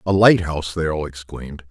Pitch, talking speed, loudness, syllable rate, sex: 80 Hz, 175 wpm, -19 LUFS, 5.7 syllables/s, male